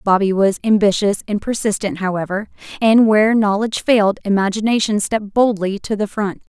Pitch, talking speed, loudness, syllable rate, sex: 205 Hz, 145 wpm, -17 LUFS, 5.6 syllables/s, female